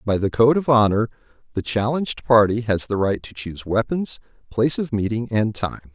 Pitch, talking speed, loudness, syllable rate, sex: 115 Hz, 190 wpm, -21 LUFS, 5.5 syllables/s, male